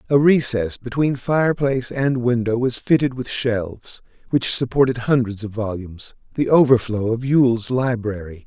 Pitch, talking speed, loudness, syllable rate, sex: 120 Hz, 140 wpm, -19 LUFS, 4.9 syllables/s, male